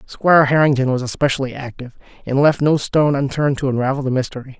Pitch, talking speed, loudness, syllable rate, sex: 135 Hz, 185 wpm, -17 LUFS, 6.9 syllables/s, male